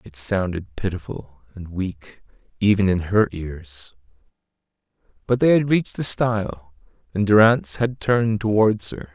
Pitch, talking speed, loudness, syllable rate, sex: 100 Hz, 140 wpm, -21 LUFS, 4.5 syllables/s, male